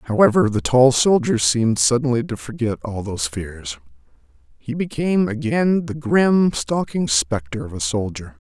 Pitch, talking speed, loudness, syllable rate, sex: 125 Hz, 150 wpm, -19 LUFS, 4.7 syllables/s, male